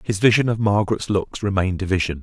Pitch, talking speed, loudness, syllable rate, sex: 100 Hz, 215 wpm, -20 LUFS, 6.6 syllables/s, male